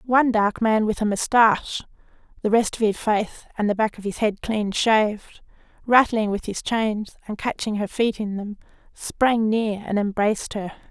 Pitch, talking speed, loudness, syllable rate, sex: 215 Hz, 185 wpm, -22 LUFS, 4.7 syllables/s, female